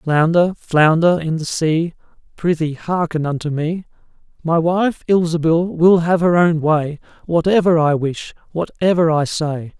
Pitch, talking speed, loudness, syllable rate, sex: 165 Hz, 140 wpm, -17 LUFS, 4.2 syllables/s, male